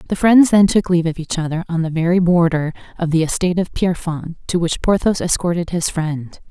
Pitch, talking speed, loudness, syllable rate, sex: 170 Hz, 210 wpm, -17 LUFS, 5.8 syllables/s, female